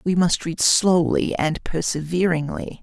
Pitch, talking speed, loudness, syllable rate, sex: 160 Hz, 125 wpm, -20 LUFS, 4.0 syllables/s, male